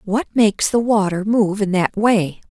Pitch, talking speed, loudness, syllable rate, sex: 205 Hz, 190 wpm, -17 LUFS, 4.5 syllables/s, female